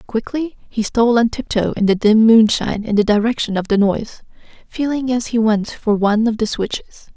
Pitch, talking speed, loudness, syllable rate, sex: 220 Hz, 200 wpm, -17 LUFS, 5.5 syllables/s, female